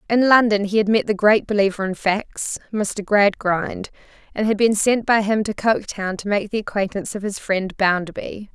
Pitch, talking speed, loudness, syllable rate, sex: 205 Hz, 195 wpm, -20 LUFS, 5.0 syllables/s, female